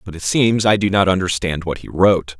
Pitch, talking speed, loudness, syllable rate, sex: 95 Hz, 250 wpm, -17 LUFS, 5.7 syllables/s, male